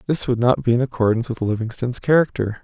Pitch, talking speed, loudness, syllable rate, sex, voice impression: 120 Hz, 205 wpm, -20 LUFS, 6.9 syllables/s, male, masculine, adult-like, muffled, sincere, slightly calm, sweet